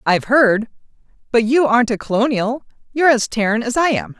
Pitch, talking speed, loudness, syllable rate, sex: 240 Hz, 170 wpm, -16 LUFS, 6.0 syllables/s, female